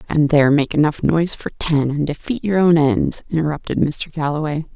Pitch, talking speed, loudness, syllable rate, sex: 155 Hz, 190 wpm, -18 LUFS, 5.5 syllables/s, female